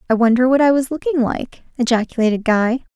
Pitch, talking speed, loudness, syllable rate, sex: 245 Hz, 185 wpm, -17 LUFS, 6.1 syllables/s, female